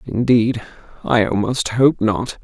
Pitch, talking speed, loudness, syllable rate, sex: 115 Hz, 125 wpm, -17 LUFS, 3.8 syllables/s, male